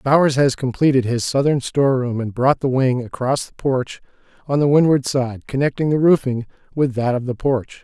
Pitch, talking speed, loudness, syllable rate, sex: 130 Hz, 190 wpm, -18 LUFS, 5.1 syllables/s, male